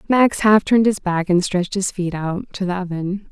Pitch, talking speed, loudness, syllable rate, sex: 190 Hz, 235 wpm, -19 LUFS, 5.1 syllables/s, female